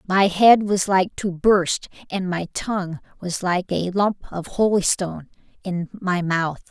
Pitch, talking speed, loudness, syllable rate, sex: 185 Hz, 160 wpm, -21 LUFS, 4.0 syllables/s, female